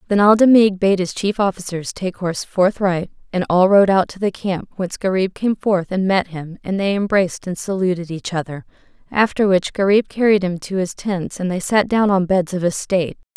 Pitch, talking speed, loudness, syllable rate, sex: 190 Hz, 210 wpm, -18 LUFS, 5.2 syllables/s, female